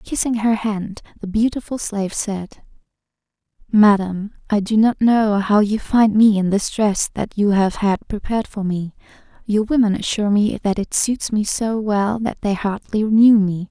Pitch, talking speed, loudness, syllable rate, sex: 210 Hz, 180 wpm, -18 LUFS, 4.5 syllables/s, female